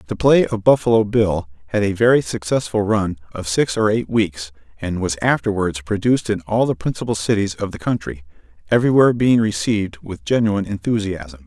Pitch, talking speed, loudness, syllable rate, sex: 100 Hz, 175 wpm, -19 LUFS, 5.5 syllables/s, male